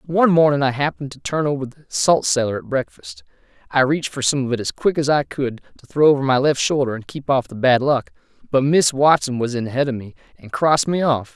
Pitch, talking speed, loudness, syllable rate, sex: 135 Hz, 250 wpm, -19 LUFS, 6.1 syllables/s, male